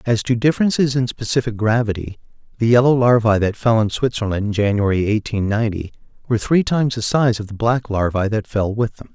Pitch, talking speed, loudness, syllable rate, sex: 115 Hz, 185 wpm, -18 LUFS, 5.8 syllables/s, male